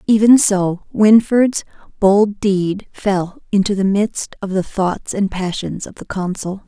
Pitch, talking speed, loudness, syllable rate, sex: 200 Hz, 155 wpm, -16 LUFS, 3.7 syllables/s, female